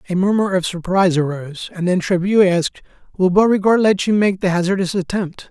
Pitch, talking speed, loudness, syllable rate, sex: 185 Hz, 185 wpm, -17 LUFS, 5.8 syllables/s, male